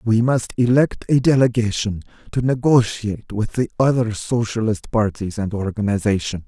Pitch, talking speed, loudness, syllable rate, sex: 115 Hz, 130 wpm, -19 LUFS, 4.9 syllables/s, male